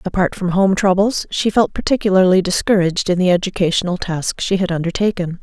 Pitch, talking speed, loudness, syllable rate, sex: 185 Hz, 165 wpm, -16 LUFS, 5.9 syllables/s, female